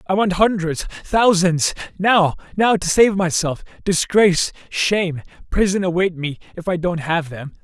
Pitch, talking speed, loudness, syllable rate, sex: 180 Hz, 135 wpm, -18 LUFS, 4.4 syllables/s, male